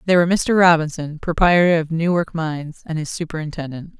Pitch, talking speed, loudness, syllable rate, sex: 165 Hz, 165 wpm, -19 LUFS, 5.9 syllables/s, female